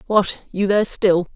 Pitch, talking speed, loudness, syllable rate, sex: 195 Hz, 175 wpm, -19 LUFS, 4.8 syllables/s, female